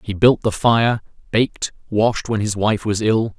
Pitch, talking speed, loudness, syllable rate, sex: 110 Hz, 195 wpm, -19 LUFS, 4.2 syllables/s, male